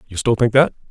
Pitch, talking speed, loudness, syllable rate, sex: 120 Hz, 265 wpm, -16 LUFS, 6.4 syllables/s, male